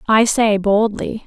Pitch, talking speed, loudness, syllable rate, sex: 215 Hz, 140 wpm, -16 LUFS, 3.6 syllables/s, female